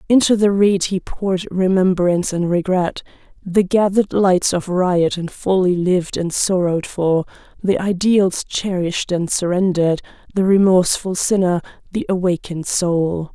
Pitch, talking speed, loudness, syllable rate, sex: 185 Hz, 135 wpm, -18 LUFS, 4.7 syllables/s, female